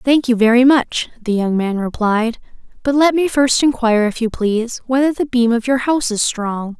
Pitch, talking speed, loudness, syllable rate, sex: 240 Hz, 210 wpm, -16 LUFS, 5.1 syllables/s, female